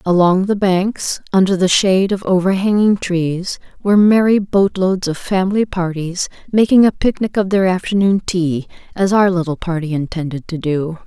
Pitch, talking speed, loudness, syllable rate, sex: 185 Hz, 165 wpm, -16 LUFS, 4.9 syllables/s, female